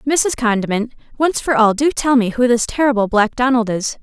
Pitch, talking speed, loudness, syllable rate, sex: 240 Hz, 210 wpm, -16 LUFS, 5.2 syllables/s, female